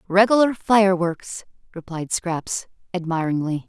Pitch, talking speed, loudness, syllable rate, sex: 185 Hz, 80 wpm, -21 LUFS, 4.0 syllables/s, female